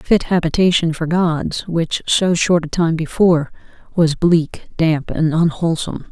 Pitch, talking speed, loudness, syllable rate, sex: 165 Hz, 145 wpm, -17 LUFS, 4.4 syllables/s, female